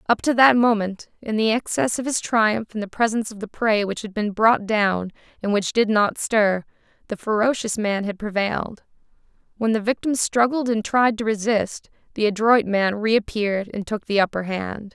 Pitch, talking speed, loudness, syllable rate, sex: 215 Hz, 195 wpm, -21 LUFS, 4.9 syllables/s, female